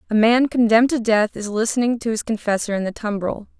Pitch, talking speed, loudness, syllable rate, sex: 220 Hz, 215 wpm, -19 LUFS, 6.1 syllables/s, female